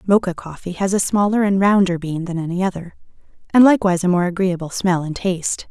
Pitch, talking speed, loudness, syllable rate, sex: 185 Hz, 200 wpm, -18 LUFS, 6.2 syllables/s, female